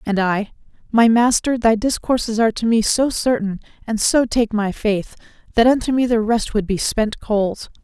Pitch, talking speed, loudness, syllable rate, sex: 225 Hz, 190 wpm, -18 LUFS, 4.9 syllables/s, female